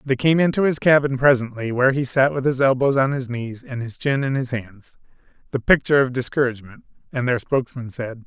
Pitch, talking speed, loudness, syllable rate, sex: 130 Hz, 205 wpm, -20 LUFS, 5.8 syllables/s, male